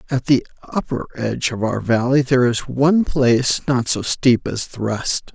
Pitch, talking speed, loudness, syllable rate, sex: 125 Hz, 190 wpm, -19 LUFS, 4.8 syllables/s, male